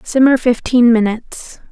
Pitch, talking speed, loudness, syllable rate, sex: 240 Hz, 105 wpm, -13 LUFS, 4.6 syllables/s, female